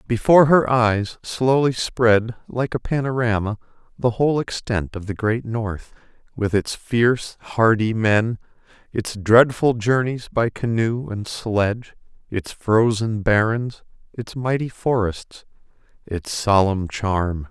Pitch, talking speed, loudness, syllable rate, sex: 115 Hz, 125 wpm, -20 LUFS, 3.8 syllables/s, male